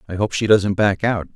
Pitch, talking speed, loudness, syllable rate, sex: 100 Hz, 265 wpm, -18 LUFS, 5.4 syllables/s, male